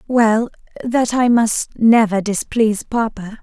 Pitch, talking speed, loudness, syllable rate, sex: 225 Hz, 125 wpm, -16 LUFS, 3.9 syllables/s, female